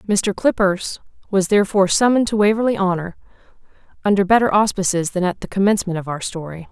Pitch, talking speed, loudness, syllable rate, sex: 195 Hz, 160 wpm, -18 LUFS, 6.7 syllables/s, female